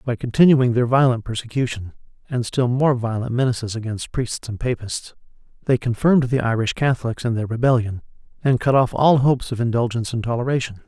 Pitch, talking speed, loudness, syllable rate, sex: 120 Hz, 170 wpm, -20 LUFS, 5.9 syllables/s, male